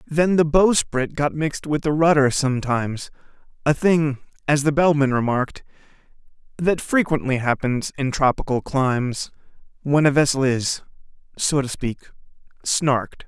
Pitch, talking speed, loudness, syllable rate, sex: 140 Hz, 130 wpm, -20 LUFS, 4.8 syllables/s, male